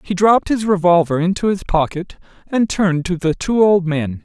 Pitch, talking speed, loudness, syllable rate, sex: 180 Hz, 200 wpm, -16 LUFS, 5.2 syllables/s, male